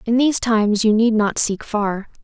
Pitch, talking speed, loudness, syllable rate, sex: 220 Hz, 215 wpm, -18 LUFS, 5.0 syllables/s, female